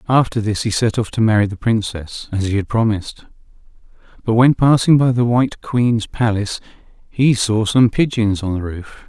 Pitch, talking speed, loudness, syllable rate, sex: 110 Hz, 185 wpm, -17 LUFS, 5.1 syllables/s, male